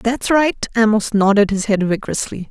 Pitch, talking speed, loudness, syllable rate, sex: 215 Hz, 165 wpm, -16 LUFS, 5.2 syllables/s, female